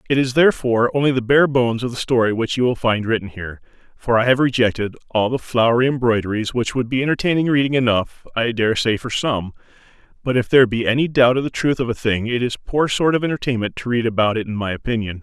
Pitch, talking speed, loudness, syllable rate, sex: 120 Hz, 230 wpm, -18 LUFS, 6.4 syllables/s, male